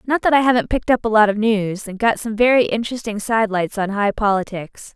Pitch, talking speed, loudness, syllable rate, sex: 215 Hz, 230 wpm, -18 LUFS, 6.0 syllables/s, female